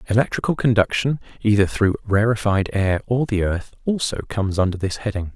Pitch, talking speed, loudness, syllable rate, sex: 105 Hz, 155 wpm, -21 LUFS, 5.8 syllables/s, male